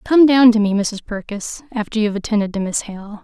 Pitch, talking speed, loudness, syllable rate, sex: 220 Hz, 240 wpm, -17 LUFS, 5.7 syllables/s, female